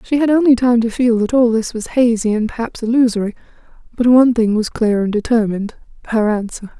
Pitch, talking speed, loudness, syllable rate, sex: 230 Hz, 195 wpm, -15 LUFS, 5.9 syllables/s, female